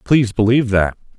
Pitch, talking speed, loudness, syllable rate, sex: 115 Hz, 150 wpm, -16 LUFS, 6.7 syllables/s, male